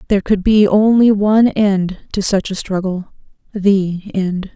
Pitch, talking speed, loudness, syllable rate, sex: 200 Hz, 145 wpm, -15 LUFS, 4.2 syllables/s, female